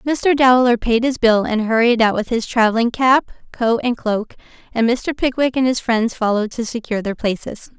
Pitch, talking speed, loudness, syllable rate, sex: 235 Hz, 200 wpm, -17 LUFS, 5.1 syllables/s, female